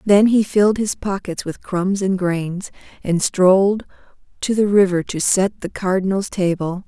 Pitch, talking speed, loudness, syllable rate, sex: 190 Hz, 165 wpm, -18 LUFS, 4.5 syllables/s, female